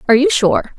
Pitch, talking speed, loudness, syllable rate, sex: 265 Hz, 230 wpm, -13 LUFS, 6.5 syllables/s, female